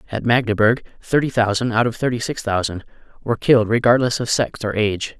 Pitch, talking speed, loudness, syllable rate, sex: 115 Hz, 185 wpm, -19 LUFS, 6.2 syllables/s, male